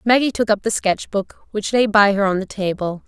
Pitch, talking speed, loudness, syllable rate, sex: 205 Hz, 255 wpm, -19 LUFS, 5.4 syllables/s, female